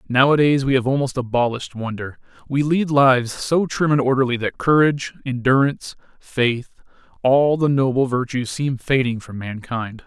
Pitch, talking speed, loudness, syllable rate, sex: 130 Hz, 150 wpm, -19 LUFS, 5.1 syllables/s, male